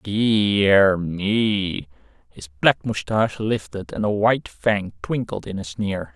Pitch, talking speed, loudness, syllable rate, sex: 100 Hz, 135 wpm, -21 LUFS, 3.4 syllables/s, male